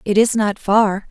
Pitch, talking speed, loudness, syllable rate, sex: 210 Hz, 215 wpm, -16 LUFS, 4.0 syllables/s, female